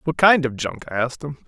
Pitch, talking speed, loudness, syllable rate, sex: 140 Hz, 285 wpm, -20 LUFS, 6.6 syllables/s, male